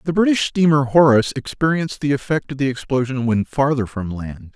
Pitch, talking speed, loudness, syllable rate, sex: 135 Hz, 185 wpm, -18 LUFS, 5.7 syllables/s, male